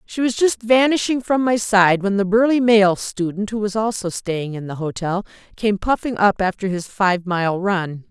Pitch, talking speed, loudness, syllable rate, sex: 205 Hz, 200 wpm, -19 LUFS, 4.6 syllables/s, female